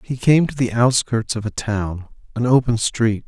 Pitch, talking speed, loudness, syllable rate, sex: 115 Hz, 185 wpm, -19 LUFS, 4.5 syllables/s, male